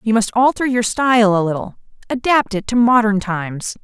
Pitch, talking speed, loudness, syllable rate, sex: 220 Hz, 170 wpm, -16 LUFS, 5.3 syllables/s, female